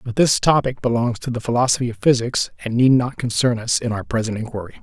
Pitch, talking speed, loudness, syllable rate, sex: 120 Hz, 225 wpm, -19 LUFS, 6.2 syllables/s, male